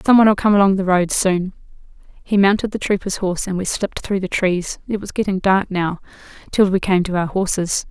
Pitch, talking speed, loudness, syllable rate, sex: 190 Hz, 205 wpm, -18 LUFS, 5.7 syllables/s, female